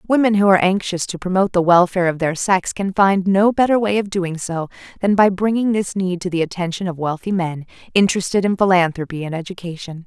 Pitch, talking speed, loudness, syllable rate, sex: 185 Hz, 210 wpm, -18 LUFS, 6.0 syllables/s, female